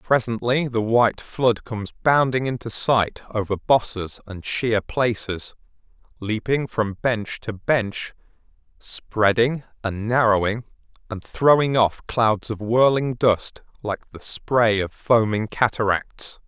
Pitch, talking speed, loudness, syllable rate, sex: 115 Hz, 125 wpm, -22 LUFS, 3.7 syllables/s, male